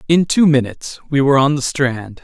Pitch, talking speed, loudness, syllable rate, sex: 140 Hz, 215 wpm, -15 LUFS, 5.7 syllables/s, male